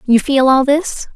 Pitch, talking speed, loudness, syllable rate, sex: 275 Hz, 205 wpm, -13 LUFS, 4.1 syllables/s, female